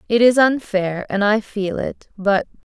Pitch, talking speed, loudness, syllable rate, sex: 210 Hz, 175 wpm, -19 LUFS, 4.1 syllables/s, female